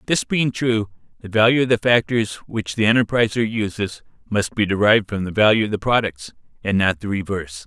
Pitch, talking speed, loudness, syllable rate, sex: 105 Hz, 195 wpm, -19 LUFS, 5.6 syllables/s, male